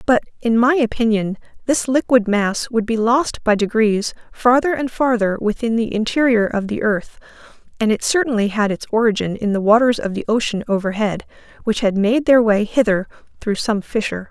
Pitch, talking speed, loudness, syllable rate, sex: 225 Hz, 180 wpm, -18 LUFS, 5.2 syllables/s, female